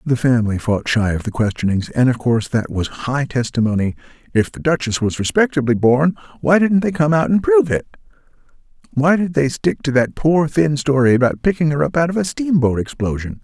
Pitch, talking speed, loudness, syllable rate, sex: 135 Hz, 200 wpm, -17 LUFS, 5.5 syllables/s, male